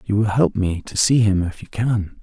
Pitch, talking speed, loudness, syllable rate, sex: 100 Hz, 270 wpm, -19 LUFS, 4.8 syllables/s, male